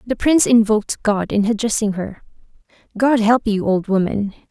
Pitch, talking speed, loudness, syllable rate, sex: 220 Hz, 160 wpm, -17 LUFS, 5.2 syllables/s, female